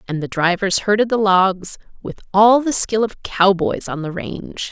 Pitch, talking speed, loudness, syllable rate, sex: 200 Hz, 190 wpm, -17 LUFS, 4.5 syllables/s, female